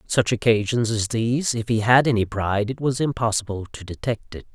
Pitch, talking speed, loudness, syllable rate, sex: 115 Hz, 210 wpm, -22 LUFS, 5.7 syllables/s, male